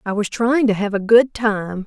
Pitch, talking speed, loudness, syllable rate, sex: 215 Hz, 260 wpm, -17 LUFS, 4.5 syllables/s, female